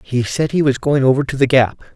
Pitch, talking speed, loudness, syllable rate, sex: 135 Hz, 275 wpm, -16 LUFS, 5.9 syllables/s, male